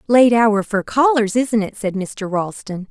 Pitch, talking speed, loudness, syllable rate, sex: 215 Hz, 185 wpm, -17 LUFS, 4.0 syllables/s, female